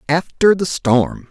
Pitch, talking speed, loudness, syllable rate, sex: 155 Hz, 140 wpm, -16 LUFS, 3.5 syllables/s, male